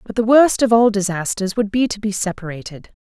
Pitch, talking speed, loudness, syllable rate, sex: 210 Hz, 215 wpm, -17 LUFS, 5.6 syllables/s, female